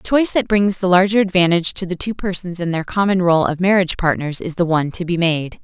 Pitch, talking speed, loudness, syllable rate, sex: 180 Hz, 255 wpm, -17 LUFS, 6.3 syllables/s, female